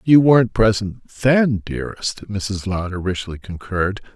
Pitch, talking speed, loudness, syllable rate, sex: 105 Hz, 130 wpm, -19 LUFS, 4.7 syllables/s, male